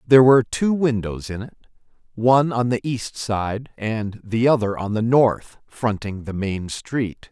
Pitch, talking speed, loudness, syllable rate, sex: 115 Hz, 170 wpm, -21 LUFS, 4.2 syllables/s, male